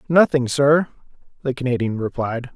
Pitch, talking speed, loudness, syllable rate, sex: 130 Hz, 115 wpm, -20 LUFS, 4.9 syllables/s, male